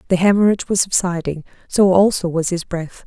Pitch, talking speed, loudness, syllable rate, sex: 180 Hz, 175 wpm, -17 LUFS, 5.7 syllables/s, female